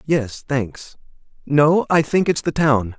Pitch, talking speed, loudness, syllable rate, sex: 140 Hz, 160 wpm, -18 LUFS, 4.0 syllables/s, male